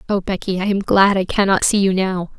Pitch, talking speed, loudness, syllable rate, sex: 190 Hz, 250 wpm, -17 LUFS, 5.6 syllables/s, female